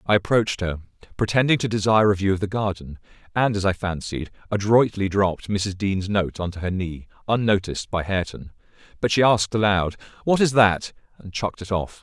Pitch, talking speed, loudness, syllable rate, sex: 100 Hz, 185 wpm, -22 LUFS, 5.8 syllables/s, male